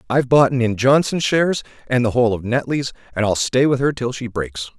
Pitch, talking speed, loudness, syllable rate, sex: 125 Hz, 225 wpm, -18 LUFS, 5.9 syllables/s, male